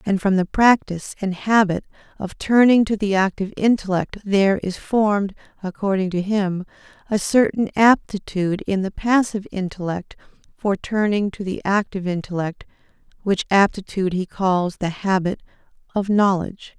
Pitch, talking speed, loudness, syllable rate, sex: 195 Hz, 140 wpm, -20 LUFS, 5.1 syllables/s, female